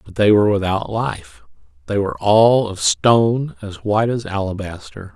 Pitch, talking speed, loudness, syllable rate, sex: 105 Hz, 150 wpm, -17 LUFS, 4.9 syllables/s, male